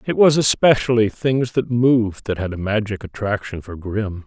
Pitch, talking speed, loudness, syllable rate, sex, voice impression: 115 Hz, 185 wpm, -19 LUFS, 4.8 syllables/s, male, very masculine, very middle-aged, very thick, tensed, slightly weak, dark, soft, slightly muffled, fluent, raspy, slightly cool, intellectual, slightly refreshing, very sincere, calm, mature, friendly, reassuring, unique, slightly elegant, wild, slightly sweet, slightly lively, kind, modest